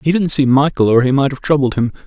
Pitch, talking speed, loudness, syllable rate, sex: 140 Hz, 290 wpm, -14 LUFS, 6.5 syllables/s, male